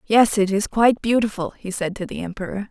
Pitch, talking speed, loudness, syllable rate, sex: 205 Hz, 220 wpm, -21 LUFS, 5.9 syllables/s, female